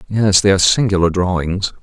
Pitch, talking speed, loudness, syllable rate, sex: 95 Hz, 165 wpm, -14 LUFS, 5.7 syllables/s, male